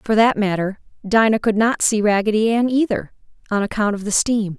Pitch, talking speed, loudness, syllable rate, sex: 215 Hz, 195 wpm, -18 LUFS, 5.3 syllables/s, female